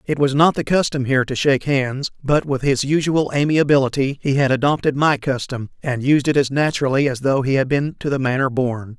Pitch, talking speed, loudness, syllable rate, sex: 135 Hz, 220 wpm, -18 LUFS, 5.6 syllables/s, male